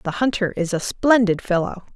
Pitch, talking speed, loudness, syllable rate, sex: 205 Hz, 185 wpm, -20 LUFS, 5.1 syllables/s, female